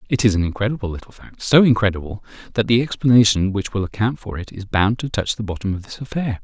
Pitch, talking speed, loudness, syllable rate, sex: 110 Hz, 235 wpm, -19 LUFS, 6.4 syllables/s, male